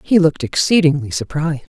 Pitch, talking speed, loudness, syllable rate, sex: 160 Hz, 135 wpm, -16 LUFS, 6.5 syllables/s, female